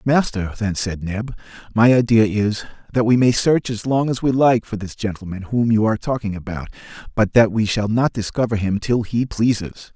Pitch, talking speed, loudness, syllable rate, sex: 110 Hz, 205 wpm, -19 LUFS, 5.2 syllables/s, male